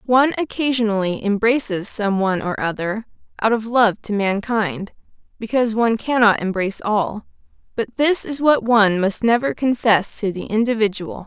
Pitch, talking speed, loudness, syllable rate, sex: 220 Hz, 150 wpm, -19 LUFS, 4.3 syllables/s, female